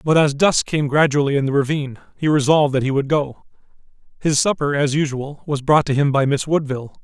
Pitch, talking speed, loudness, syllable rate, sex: 145 Hz, 215 wpm, -18 LUFS, 6.0 syllables/s, male